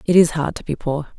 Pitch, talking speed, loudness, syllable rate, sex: 155 Hz, 305 wpm, -20 LUFS, 6.2 syllables/s, female